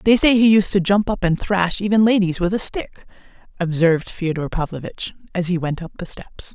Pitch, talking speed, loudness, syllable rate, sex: 185 Hz, 210 wpm, -19 LUFS, 5.3 syllables/s, female